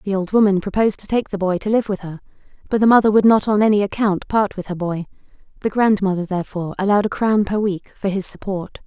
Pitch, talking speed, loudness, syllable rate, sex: 200 Hz, 235 wpm, -19 LUFS, 6.5 syllables/s, female